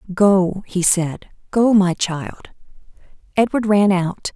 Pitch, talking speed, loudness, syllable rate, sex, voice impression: 195 Hz, 125 wpm, -18 LUFS, 3.3 syllables/s, female, very feminine, slightly adult-like, very thin, slightly tensed, powerful, bright, soft, clear, fluent, raspy, cute, intellectual, very refreshing, sincere, slightly calm, slightly friendly, slightly reassuring, unique, slightly elegant, slightly wild, sweet, very lively, slightly kind, slightly intense, slightly sharp, light